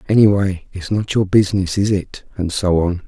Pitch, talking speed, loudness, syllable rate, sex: 95 Hz, 195 wpm, -17 LUFS, 5.1 syllables/s, male